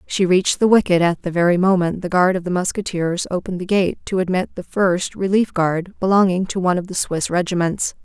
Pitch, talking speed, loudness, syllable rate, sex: 180 Hz, 215 wpm, -19 LUFS, 5.7 syllables/s, female